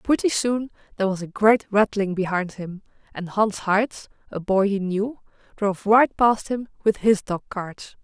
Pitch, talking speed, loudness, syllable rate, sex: 205 Hz, 185 wpm, -22 LUFS, 4.6 syllables/s, female